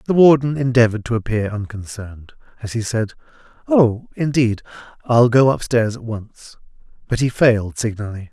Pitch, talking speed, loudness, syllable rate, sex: 115 Hz, 145 wpm, -18 LUFS, 5.1 syllables/s, male